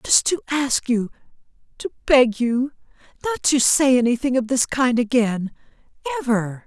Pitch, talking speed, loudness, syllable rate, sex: 255 Hz, 115 wpm, -20 LUFS, 4.3 syllables/s, female